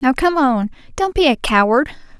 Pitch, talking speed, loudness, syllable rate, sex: 275 Hz, 190 wpm, -16 LUFS, 4.9 syllables/s, female